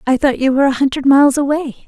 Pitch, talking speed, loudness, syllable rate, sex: 275 Hz, 255 wpm, -14 LUFS, 7.3 syllables/s, female